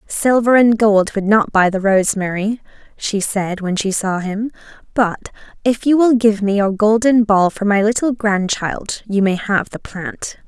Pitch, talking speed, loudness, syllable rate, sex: 210 Hz, 185 wpm, -16 LUFS, 4.3 syllables/s, female